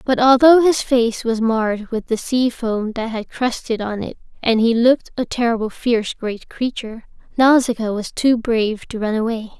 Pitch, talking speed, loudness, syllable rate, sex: 235 Hz, 190 wpm, -18 LUFS, 4.9 syllables/s, female